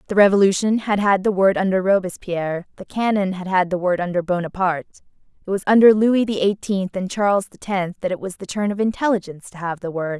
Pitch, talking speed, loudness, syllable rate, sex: 190 Hz, 220 wpm, -20 LUFS, 6.0 syllables/s, female